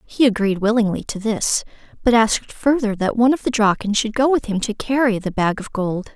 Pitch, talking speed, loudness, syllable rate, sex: 220 Hz, 225 wpm, -19 LUFS, 5.5 syllables/s, female